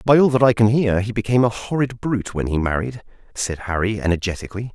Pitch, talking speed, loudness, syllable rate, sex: 110 Hz, 215 wpm, -20 LUFS, 6.4 syllables/s, male